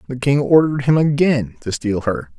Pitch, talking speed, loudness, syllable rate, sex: 130 Hz, 200 wpm, -17 LUFS, 5.2 syllables/s, male